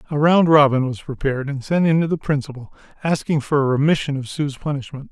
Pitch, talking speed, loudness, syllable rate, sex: 145 Hz, 210 wpm, -19 LUFS, 6.1 syllables/s, male